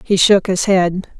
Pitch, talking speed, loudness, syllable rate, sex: 190 Hz, 200 wpm, -14 LUFS, 4.0 syllables/s, female